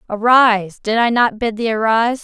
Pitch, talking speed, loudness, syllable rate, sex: 225 Hz, 190 wpm, -15 LUFS, 5.4 syllables/s, female